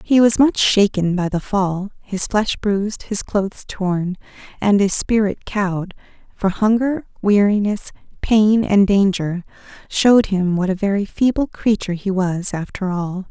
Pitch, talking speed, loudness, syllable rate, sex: 200 Hz, 155 wpm, -18 LUFS, 4.3 syllables/s, female